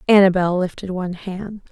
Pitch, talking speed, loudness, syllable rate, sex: 185 Hz, 140 wpm, -19 LUFS, 5.4 syllables/s, female